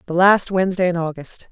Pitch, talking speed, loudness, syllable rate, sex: 180 Hz, 200 wpm, -18 LUFS, 6.2 syllables/s, female